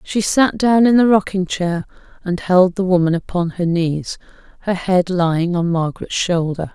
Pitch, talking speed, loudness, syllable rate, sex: 180 Hz, 180 wpm, -17 LUFS, 4.7 syllables/s, female